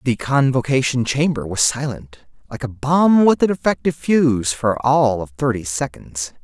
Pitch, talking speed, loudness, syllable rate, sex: 130 Hz, 160 wpm, -18 LUFS, 4.6 syllables/s, male